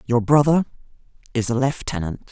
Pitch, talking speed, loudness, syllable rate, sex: 125 Hz, 130 wpm, -20 LUFS, 5.5 syllables/s, female